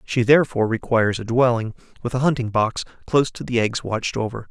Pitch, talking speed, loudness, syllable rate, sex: 120 Hz, 200 wpm, -21 LUFS, 6.4 syllables/s, male